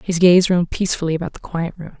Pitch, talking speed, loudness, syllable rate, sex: 175 Hz, 240 wpm, -18 LUFS, 6.8 syllables/s, female